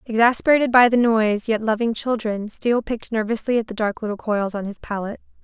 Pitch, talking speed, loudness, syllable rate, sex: 225 Hz, 200 wpm, -20 LUFS, 6.3 syllables/s, female